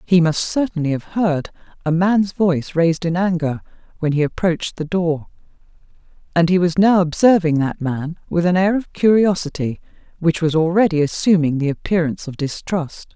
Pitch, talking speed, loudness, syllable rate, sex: 170 Hz, 160 wpm, -18 LUFS, 5.2 syllables/s, female